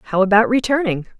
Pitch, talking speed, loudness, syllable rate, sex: 220 Hz, 150 wpm, -16 LUFS, 5.6 syllables/s, female